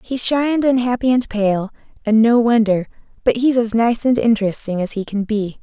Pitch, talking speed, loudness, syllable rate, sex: 225 Hz, 205 wpm, -17 LUFS, 5.2 syllables/s, female